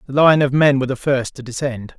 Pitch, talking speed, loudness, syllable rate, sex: 135 Hz, 240 wpm, -17 LUFS, 5.5 syllables/s, male